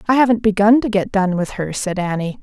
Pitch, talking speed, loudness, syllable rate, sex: 205 Hz, 250 wpm, -17 LUFS, 5.8 syllables/s, female